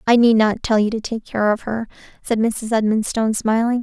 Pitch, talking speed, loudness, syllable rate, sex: 220 Hz, 220 wpm, -19 LUFS, 5.4 syllables/s, female